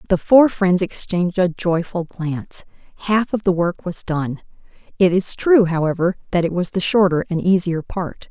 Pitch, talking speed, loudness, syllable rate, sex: 180 Hz, 180 wpm, -19 LUFS, 4.7 syllables/s, female